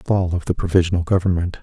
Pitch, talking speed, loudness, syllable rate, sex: 90 Hz, 220 wpm, -19 LUFS, 7.1 syllables/s, male